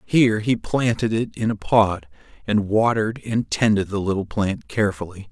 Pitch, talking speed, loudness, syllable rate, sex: 105 Hz, 170 wpm, -21 LUFS, 5.0 syllables/s, male